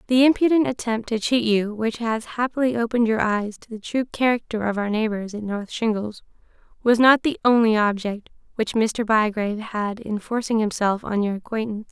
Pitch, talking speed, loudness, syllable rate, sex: 225 Hz, 185 wpm, -22 LUFS, 5.3 syllables/s, female